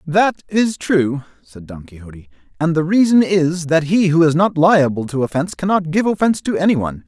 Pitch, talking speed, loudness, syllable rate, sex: 160 Hz, 195 wpm, -16 LUFS, 5.3 syllables/s, male